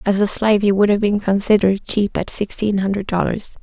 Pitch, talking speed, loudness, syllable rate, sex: 200 Hz, 215 wpm, -18 LUFS, 5.8 syllables/s, female